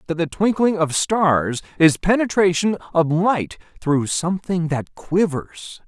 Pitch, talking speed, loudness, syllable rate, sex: 170 Hz, 135 wpm, -19 LUFS, 3.9 syllables/s, male